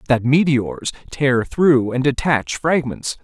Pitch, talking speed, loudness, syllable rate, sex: 130 Hz, 130 wpm, -18 LUFS, 3.5 syllables/s, male